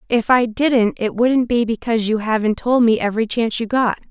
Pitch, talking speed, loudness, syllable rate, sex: 230 Hz, 220 wpm, -17 LUFS, 5.5 syllables/s, female